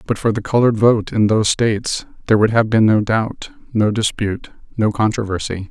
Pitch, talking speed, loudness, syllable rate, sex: 110 Hz, 190 wpm, -17 LUFS, 5.8 syllables/s, male